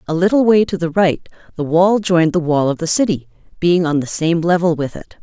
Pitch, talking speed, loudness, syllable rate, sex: 170 Hz, 240 wpm, -16 LUFS, 5.7 syllables/s, female